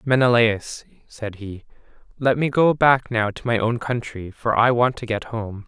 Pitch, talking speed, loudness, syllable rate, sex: 115 Hz, 190 wpm, -20 LUFS, 4.4 syllables/s, male